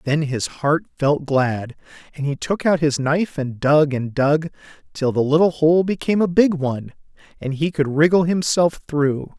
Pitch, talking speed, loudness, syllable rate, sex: 150 Hz, 185 wpm, -19 LUFS, 4.6 syllables/s, male